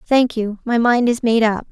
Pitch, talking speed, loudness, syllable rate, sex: 235 Hz, 245 wpm, -17 LUFS, 4.7 syllables/s, female